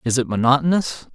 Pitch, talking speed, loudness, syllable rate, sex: 135 Hz, 155 wpm, -18 LUFS, 6.0 syllables/s, male